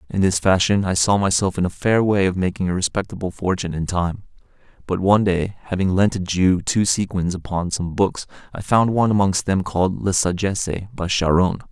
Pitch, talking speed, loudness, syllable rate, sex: 95 Hz, 200 wpm, -20 LUFS, 5.6 syllables/s, male